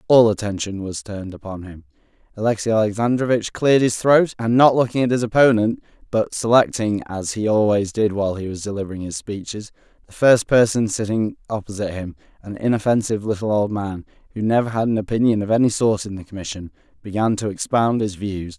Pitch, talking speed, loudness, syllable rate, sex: 105 Hz, 180 wpm, -20 LUFS, 5.9 syllables/s, male